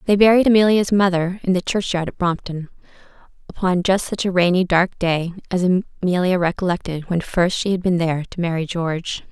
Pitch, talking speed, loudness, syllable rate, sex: 180 Hz, 180 wpm, -19 LUFS, 5.5 syllables/s, female